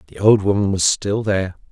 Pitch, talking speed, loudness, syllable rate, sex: 100 Hz, 210 wpm, -18 LUFS, 5.6 syllables/s, male